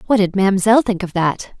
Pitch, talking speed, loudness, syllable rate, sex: 200 Hz, 225 wpm, -16 LUFS, 5.7 syllables/s, female